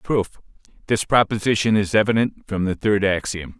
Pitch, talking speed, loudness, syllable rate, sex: 105 Hz, 135 wpm, -20 LUFS, 5.0 syllables/s, male